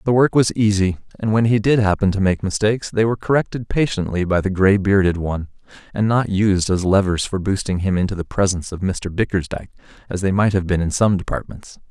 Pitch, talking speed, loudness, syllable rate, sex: 100 Hz, 215 wpm, -19 LUFS, 6.0 syllables/s, male